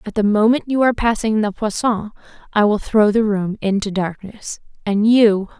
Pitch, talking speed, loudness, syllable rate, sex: 210 Hz, 180 wpm, -17 LUFS, 4.9 syllables/s, female